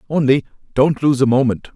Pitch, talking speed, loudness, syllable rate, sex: 135 Hz, 170 wpm, -16 LUFS, 5.7 syllables/s, male